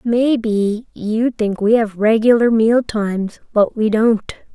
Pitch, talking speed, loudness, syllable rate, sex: 220 Hz, 145 wpm, -16 LUFS, 4.2 syllables/s, female